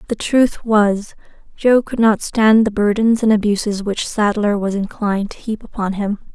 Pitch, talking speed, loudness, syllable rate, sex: 210 Hz, 180 wpm, -17 LUFS, 4.6 syllables/s, female